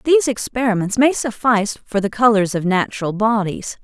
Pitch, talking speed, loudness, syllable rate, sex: 220 Hz, 155 wpm, -18 LUFS, 5.5 syllables/s, female